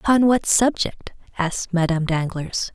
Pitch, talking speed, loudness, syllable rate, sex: 190 Hz, 130 wpm, -20 LUFS, 4.9 syllables/s, female